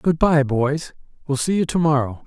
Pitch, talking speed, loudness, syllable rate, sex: 145 Hz, 160 wpm, -20 LUFS, 4.8 syllables/s, male